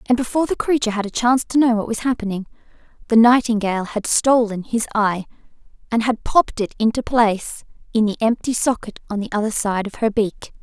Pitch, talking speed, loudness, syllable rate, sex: 225 Hz, 200 wpm, -19 LUFS, 6.0 syllables/s, female